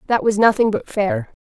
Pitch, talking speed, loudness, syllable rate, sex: 220 Hz, 210 wpm, -18 LUFS, 5.2 syllables/s, female